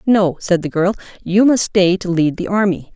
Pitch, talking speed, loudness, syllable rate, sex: 185 Hz, 225 wpm, -16 LUFS, 4.7 syllables/s, female